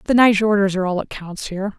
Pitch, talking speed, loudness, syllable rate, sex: 200 Hz, 235 wpm, -18 LUFS, 6.9 syllables/s, female